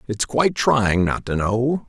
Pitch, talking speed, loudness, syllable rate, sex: 115 Hz, 190 wpm, -20 LUFS, 4.1 syllables/s, male